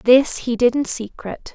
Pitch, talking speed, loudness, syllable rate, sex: 245 Hz, 195 wpm, -18 LUFS, 4.2 syllables/s, female